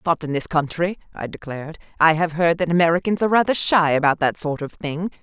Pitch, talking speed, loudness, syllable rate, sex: 165 Hz, 220 wpm, -20 LUFS, 6.0 syllables/s, female